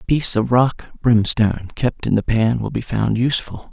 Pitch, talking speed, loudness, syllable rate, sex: 115 Hz, 210 wpm, -18 LUFS, 5.1 syllables/s, male